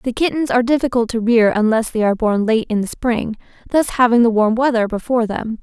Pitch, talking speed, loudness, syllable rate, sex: 230 Hz, 225 wpm, -17 LUFS, 6.0 syllables/s, female